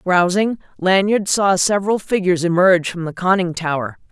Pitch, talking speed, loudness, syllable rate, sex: 185 Hz, 145 wpm, -17 LUFS, 5.4 syllables/s, female